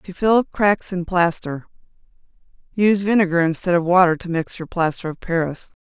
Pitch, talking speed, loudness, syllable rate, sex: 175 Hz, 155 wpm, -19 LUFS, 5.3 syllables/s, female